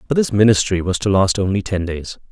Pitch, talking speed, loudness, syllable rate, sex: 100 Hz, 235 wpm, -17 LUFS, 5.9 syllables/s, male